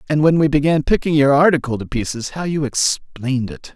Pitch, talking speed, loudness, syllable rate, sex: 145 Hz, 210 wpm, -17 LUFS, 5.6 syllables/s, male